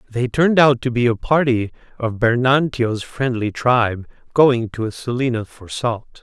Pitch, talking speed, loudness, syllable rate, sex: 120 Hz, 165 wpm, -18 LUFS, 4.5 syllables/s, male